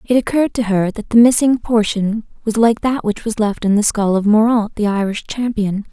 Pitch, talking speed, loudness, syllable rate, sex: 220 Hz, 225 wpm, -16 LUFS, 5.2 syllables/s, female